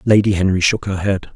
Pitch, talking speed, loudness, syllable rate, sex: 100 Hz, 220 wpm, -17 LUFS, 5.9 syllables/s, male